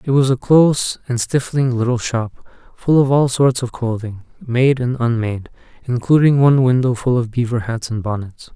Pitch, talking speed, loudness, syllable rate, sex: 125 Hz, 180 wpm, -17 LUFS, 5.1 syllables/s, male